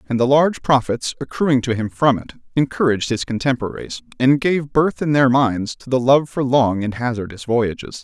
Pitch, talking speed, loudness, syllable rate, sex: 130 Hz, 195 wpm, -18 LUFS, 5.3 syllables/s, male